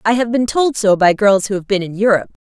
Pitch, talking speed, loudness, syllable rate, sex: 210 Hz, 295 wpm, -15 LUFS, 6.3 syllables/s, female